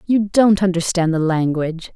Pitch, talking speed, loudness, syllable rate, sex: 180 Hz, 155 wpm, -17 LUFS, 4.9 syllables/s, female